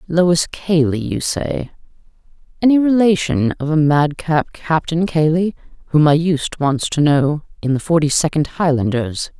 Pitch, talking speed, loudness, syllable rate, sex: 155 Hz, 140 wpm, -17 LUFS, 4.3 syllables/s, female